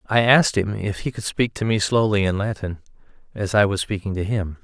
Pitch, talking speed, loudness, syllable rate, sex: 100 Hz, 235 wpm, -21 LUFS, 5.6 syllables/s, male